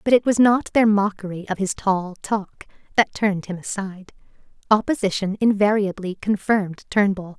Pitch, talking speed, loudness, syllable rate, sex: 200 Hz, 145 wpm, -21 LUFS, 5.2 syllables/s, female